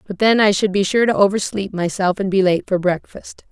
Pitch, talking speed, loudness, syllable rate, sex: 195 Hz, 240 wpm, -17 LUFS, 5.5 syllables/s, female